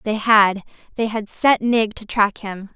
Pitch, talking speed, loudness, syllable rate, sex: 215 Hz, 175 wpm, -18 LUFS, 3.9 syllables/s, female